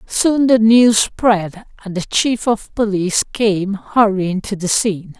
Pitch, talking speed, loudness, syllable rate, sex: 210 Hz, 160 wpm, -15 LUFS, 3.8 syllables/s, female